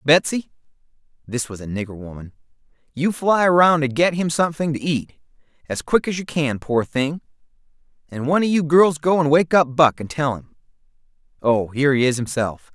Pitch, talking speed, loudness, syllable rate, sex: 145 Hz, 190 wpm, -19 LUFS, 4.9 syllables/s, male